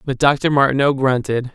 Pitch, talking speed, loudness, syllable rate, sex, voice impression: 135 Hz, 155 wpm, -17 LUFS, 4.9 syllables/s, male, masculine, adult-like, tensed, powerful, bright, clear, fluent, intellectual, friendly, slightly unique, wild, lively, slightly sharp